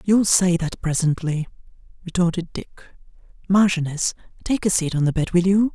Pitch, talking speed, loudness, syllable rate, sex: 175 Hz, 155 wpm, -21 LUFS, 5.0 syllables/s, male